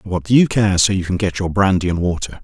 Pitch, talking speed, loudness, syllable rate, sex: 95 Hz, 320 wpm, -16 LUFS, 6.4 syllables/s, male